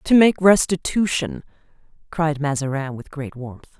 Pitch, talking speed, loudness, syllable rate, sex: 155 Hz, 125 wpm, -20 LUFS, 4.4 syllables/s, female